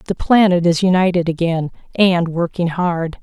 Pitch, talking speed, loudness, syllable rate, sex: 175 Hz, 150 wpm, -16 LUFS, 4.4 syllables/s, female